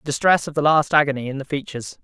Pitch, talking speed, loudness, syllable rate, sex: 145 Hz, 265 wpm, -19 LUFS, 7.4 syllables/s, male